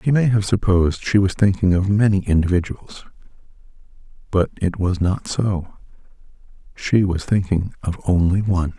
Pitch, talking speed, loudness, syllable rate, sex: 95 Hz, 135 wpm, -19 LUFS, 4.9 syllables/s, male